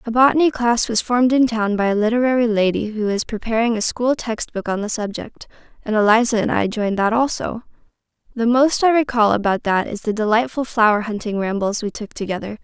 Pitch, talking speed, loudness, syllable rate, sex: 225 Hz, 205 wpm, -18 LUFS, 5.8 syllables/s, female